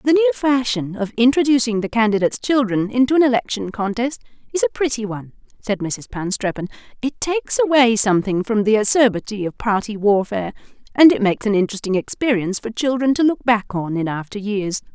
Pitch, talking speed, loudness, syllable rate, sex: 230 Hz, 175 wpm, -19 LUFS, 6.1 syllables/s, female